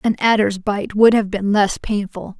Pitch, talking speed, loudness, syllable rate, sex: 210 Hz, 200 wpm, -17 LUFS, 4.4 syllables/s, female